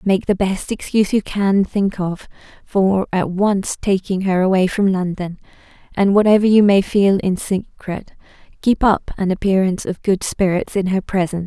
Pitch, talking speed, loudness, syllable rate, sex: 190 Hz, 175 wpm, -17 LUFS, 4.7 syllables/s, female